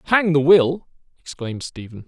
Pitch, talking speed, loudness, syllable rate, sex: 150 Hz, 145 wpm, -18 LUFS, 5.2 syllables/s, male